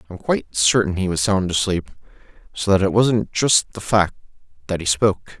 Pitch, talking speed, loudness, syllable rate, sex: 100 Hz, 190 wpm, -19 LUFS, 5.3 syllables/s, male